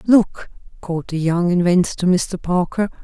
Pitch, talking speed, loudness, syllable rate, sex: 180 Hz, 160 wpm, -18 LUFS, 5.0 syllables/s, female